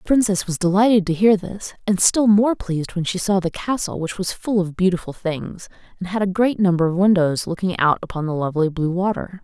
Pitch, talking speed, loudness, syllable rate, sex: 185 Hz, 230 wpm, -19 LUFS, 5.5 syllables/s, female